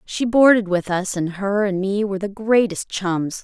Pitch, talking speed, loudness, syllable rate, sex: 200 Hz, 210 wpm, -19 LUFS, 4.5 syllables/s, female